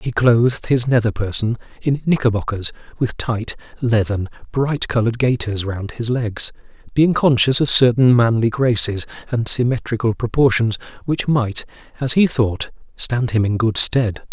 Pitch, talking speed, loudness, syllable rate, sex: 120 Hz, 145 wpm, -18 LUFS, 4.6 syllables/s, male